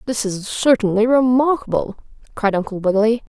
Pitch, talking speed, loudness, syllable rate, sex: 225 Hz, 125 wpm, -18 LUFS, 5.4 syllables/s, female